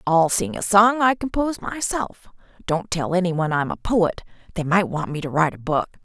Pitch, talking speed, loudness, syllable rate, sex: 185 Hz, 210 wpm, -21 LUFS, 5.3 syllables/s, female